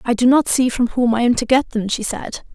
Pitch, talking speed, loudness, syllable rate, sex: 240 Hz, 305 wpm, -17 LUFS, 5.5 syllables/s, female